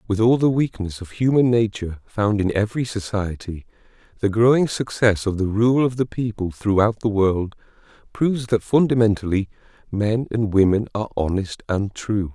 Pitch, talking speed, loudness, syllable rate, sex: 105 Hz, 160 wpm, -21 LUFS, 5.1 syllables/s, male